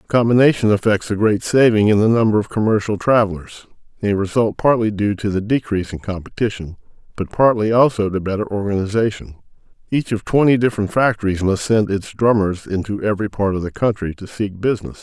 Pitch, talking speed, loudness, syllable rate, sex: 105 Hz, 175 wpm, -18 LUFS, 5.9 syllables/s, male